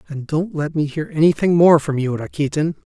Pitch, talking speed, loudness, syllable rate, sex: 155 Hz, 205 wpm, -18 LUFS, 5.4 syllables/s, male